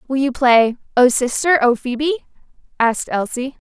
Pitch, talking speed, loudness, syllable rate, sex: 260 Hz, 145 wpm, -17 LUFS, 4.6 syllables/s, female